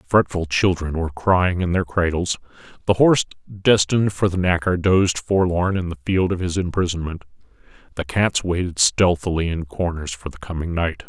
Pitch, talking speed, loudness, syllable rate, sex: 90 Hz, 175 wpm, -20 LUFS, 5.3 syllables/s, male